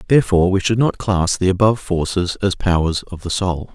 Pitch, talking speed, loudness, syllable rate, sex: 95 Hz, 210 wpm, -18 LUFS, 5.6 syllables/s, male